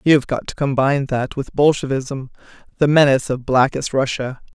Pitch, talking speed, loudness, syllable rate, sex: 135 Hz, 155 wpm, -18 LUFS, 5.4 syllables/s, female